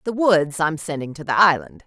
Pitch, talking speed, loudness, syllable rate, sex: 160 Hz, 225 wpm, -19 LUFS, 5.1 syllables/s, female